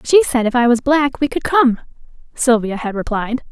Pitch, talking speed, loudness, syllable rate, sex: 250 Hz, 205 wpm, -16 LUFS, 4.8 syllables/s, female